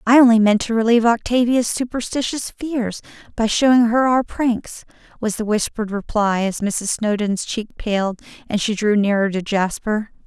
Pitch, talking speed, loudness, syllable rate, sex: 220 Hz, 165 wpm, -19 LUFS, 4.8 syllables/s, female